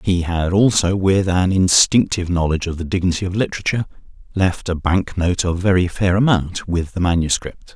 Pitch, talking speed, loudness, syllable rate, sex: 90 Hz, 180 wpm, -18 LUFS, 5.4 syllables/s, male